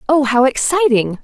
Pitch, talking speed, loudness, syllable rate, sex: 265 Hz, 145 wpm, -14 LUFS, 4.8 syllables/s, female